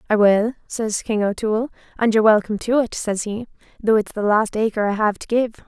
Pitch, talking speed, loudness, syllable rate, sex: 215 Hz, 220 wpm, -20 LUFS, 5.8 syllables/s, female